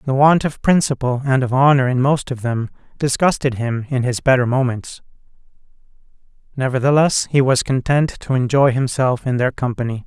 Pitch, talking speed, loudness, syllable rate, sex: 130 Hz, 160 wpm, -17 LUFS, 5.2 syllables/s, male